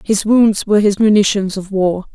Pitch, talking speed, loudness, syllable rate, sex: 205 Hz, 195 wpm, -14 LUFS, 5.1 syllables/s, female